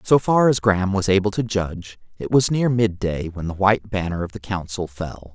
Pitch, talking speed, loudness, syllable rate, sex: 100 Hz, 225 wpm, -21 LUFS, 5.4 syllables/s, male